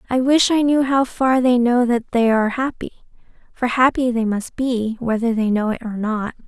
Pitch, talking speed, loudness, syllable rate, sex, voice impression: 240 Hz, 205 wpm, -18 LUFS, 4.9 syllables/s, female, feminine, young, slightly relaxed, powerful, bright, soft, cute, calm, friendly, reassuring, slightly lively, kind